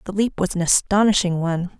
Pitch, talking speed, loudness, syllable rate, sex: 185 Hz, 200 wpm, -19 LUFS, 6.2 syllables/s, female